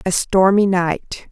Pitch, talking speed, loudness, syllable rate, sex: 190 Hz, 135 wpm, -16 LUFS, 3.4 syllables/s, female